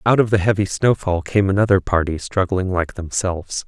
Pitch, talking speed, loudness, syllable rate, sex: 95 Hz, 180 wpm, -19 LUFS, 5.4 syllables/s, male